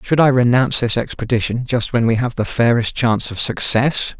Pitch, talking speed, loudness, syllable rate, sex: 120 Hz, 200 wpm, -17 LUFS, 5.4 syllables/s, male